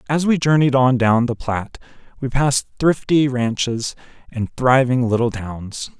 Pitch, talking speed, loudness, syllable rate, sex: 125 Hz, 150 wpm, -18 LUFS, 4.5 syllables/s, male